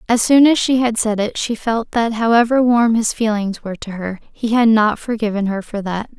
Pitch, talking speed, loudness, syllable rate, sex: 225 Hz, 235 wpm, -17 LUFS, 5.1 syllables/s, female